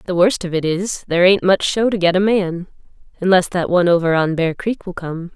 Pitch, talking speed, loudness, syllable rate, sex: 180 Hz, 245 wpm, -17 LUFS, 5.6 syllables/s, female